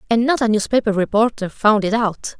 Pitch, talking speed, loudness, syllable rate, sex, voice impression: 220 Hz, 200 wpm, -18 LUFS, 5.5 syllables/s, female, slightly gender-neutral, slightly young, slightly weak, slightly clear, slightly halting, friendly, unique, kind, modest